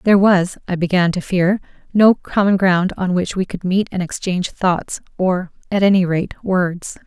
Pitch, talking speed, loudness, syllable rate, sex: 185 Hz, 185 wpm, -17 LUFS, 4.7 syllables/s, female